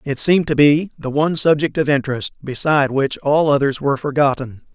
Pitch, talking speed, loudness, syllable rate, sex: 145 Hz, 190 wpm, -17 LUFS, 5.9 syllables/s, male